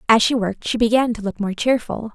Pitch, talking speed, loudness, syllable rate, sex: 225 Hz, 250 wpm, -19 LUFS, 6.1 syllables/s, female